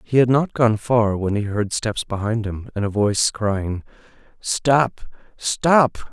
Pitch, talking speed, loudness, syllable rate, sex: 115 Hz, 165 wpm, -20 LUFS, 3.8 syllables/s, male